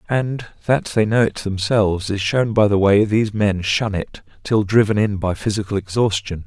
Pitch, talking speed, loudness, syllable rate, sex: 105 Hz, 195 wpm, -19 LUFS, 4.8 syllables/s, male